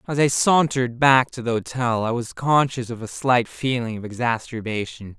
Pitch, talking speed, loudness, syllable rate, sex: 120 Hz, 185 wpm, -21 LUFS, 5.0 syllables/s, male